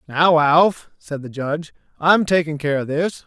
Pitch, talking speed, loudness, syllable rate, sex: 155 Hz, 185 wpm, -18 LUFS, 4.4 syllables/s, male